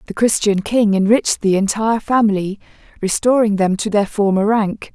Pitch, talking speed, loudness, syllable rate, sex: 210 Hz, 160 wpm, -16 LUFS, 5.3 syllables/s, female